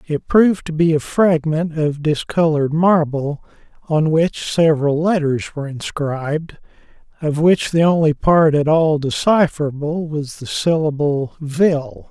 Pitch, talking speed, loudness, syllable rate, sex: 155 Hz, 140 wpm, -17 LUFS, 4.3 syllables/s, male